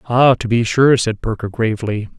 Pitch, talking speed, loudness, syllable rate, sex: 115 Hz, 195 wpm, -16 LUFS, 5.2 syllables/s, male